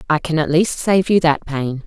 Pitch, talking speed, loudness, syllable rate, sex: 160 Hz, 255 wpm, -17 LUFS, 4.9 syllables/s, female